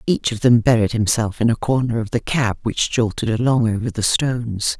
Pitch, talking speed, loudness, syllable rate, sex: 115 Hz, 215 wpm, -19 LUFS, 5.2 syllables/s, female